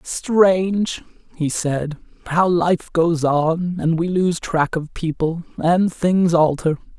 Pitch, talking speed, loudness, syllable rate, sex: 170 Hz, 135 wpm, -19 LUFS, 3.2 syllables/s, male